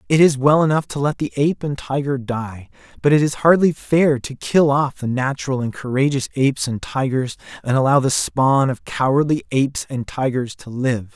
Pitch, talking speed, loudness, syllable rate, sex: 135 Hz, 200 wpm, -19 LUFS, 4.9 syllables/s, male